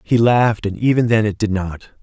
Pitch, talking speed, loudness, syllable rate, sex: 110 Hz, 235 wpm, -17 LUFS, 5.4 syllables/s, male